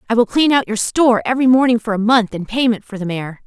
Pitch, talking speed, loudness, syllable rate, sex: 225 Hz, 275 wpm, -16 LUFS, 6.4 syllables/s, female